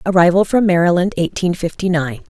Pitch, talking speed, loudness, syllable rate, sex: 175 Hz, 155 wpm, -16 LUFS, 5.8 syllables/s, female